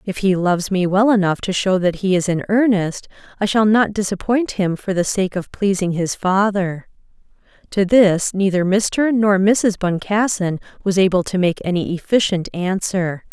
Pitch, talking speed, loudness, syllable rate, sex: 190 Hz, 175 wpm, -18 LUFS, 4.6 syllables/s, female